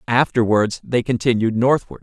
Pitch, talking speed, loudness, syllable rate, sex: 120 Hz, 120 wpm, -18 LUFS, 4.8 syllables/s, male